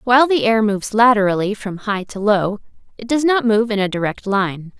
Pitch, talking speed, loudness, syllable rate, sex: 215 Hz, 215 wpm, -17 LUFS, 5.4 syllables/s, female